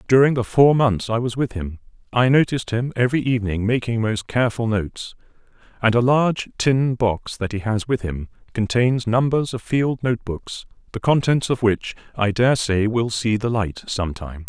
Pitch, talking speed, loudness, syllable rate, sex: 115 Hz, 190 wpm, -20 LUFS, 4.9 syllables/s, male